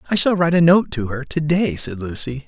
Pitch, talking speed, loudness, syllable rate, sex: 145 Hz, 265 wpm, -18 LUFS, 5.8 syllables/s, male